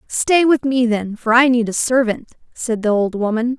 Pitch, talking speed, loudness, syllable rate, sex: 240 Hz, 215 wpm, -16 LUFS, 4.6 syllables/s, female